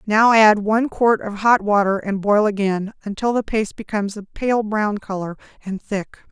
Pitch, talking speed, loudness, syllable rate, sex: 210 Hz, 190 wpm, -19 LUFS, 5.0 syllables/s, female